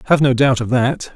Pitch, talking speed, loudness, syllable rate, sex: 130 Hz, 260 wpm, -16 LUFS, 5.4 syllables/s, male